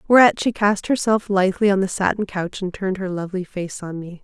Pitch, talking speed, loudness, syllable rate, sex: 195 Hz, 225 wpm, -20 LUFS, 5.9 syllables/s, female